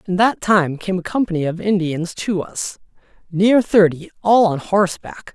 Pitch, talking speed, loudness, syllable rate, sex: 185 Hz, 170 wpm, -18 LUFS, 4.6 syllables/s, male